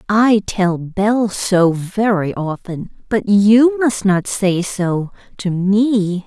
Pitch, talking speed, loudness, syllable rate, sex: 200 Hz, 135 wpm, -16 LUFS, 2.8 syllables/s, female